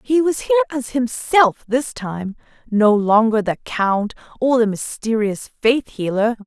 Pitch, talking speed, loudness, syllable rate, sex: 235 Hz, 150 wpm, -18 LUFS, 4.2 syllables/s, female